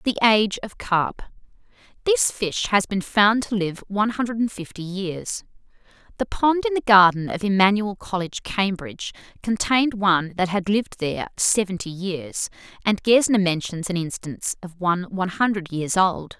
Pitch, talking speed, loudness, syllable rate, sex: 195 Hz, 155 wpm, -22 LUFS, 4.9 syllables/s, female